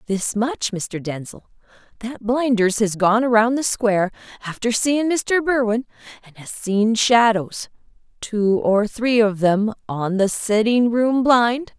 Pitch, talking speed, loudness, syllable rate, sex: 225 Hz, 135 wpm, -19 LUFS, 3.7 syllables/s, female